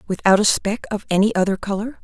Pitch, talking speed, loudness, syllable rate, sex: 205 Hz, 205 wpm, -19 LUFS, 6.0 syllables/s, female